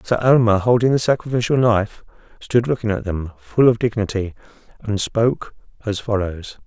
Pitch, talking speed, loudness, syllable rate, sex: 110 Hz, 155 wpm, -19 LUFS, 5.3 syllables/s, male